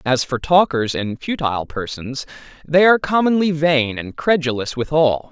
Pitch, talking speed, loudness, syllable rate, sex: 145 Hz, 145 wpm, -18 LUFS, 4.8 syllables/s, male